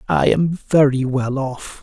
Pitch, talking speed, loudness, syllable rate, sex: 130 Hz, 165 wpm, -18 LUFS, 3.6 syllables/s, male